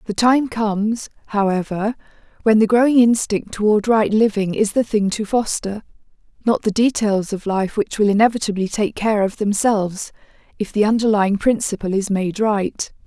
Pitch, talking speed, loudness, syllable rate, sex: 210 Hz, 155 wpm, -18 LUFS, 4.9 syllables/s, female